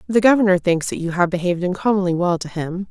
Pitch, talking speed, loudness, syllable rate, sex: 185 Hz, 225 wpm, -19 LUFS, 6.6 syllables/s, female